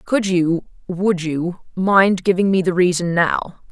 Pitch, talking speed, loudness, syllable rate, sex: 180 Hz, 145 wpm, -18 LUFS, 3.8 syllables/s, female